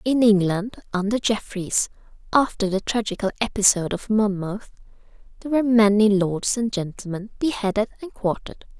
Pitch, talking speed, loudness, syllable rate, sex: 210 Hz, 130 wpm, -22 LUFS, 5.3 syllables/s, female